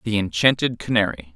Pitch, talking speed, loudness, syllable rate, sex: 115 Hz, 135 wpm, -20 LUFS, 5.6 syllables/s, male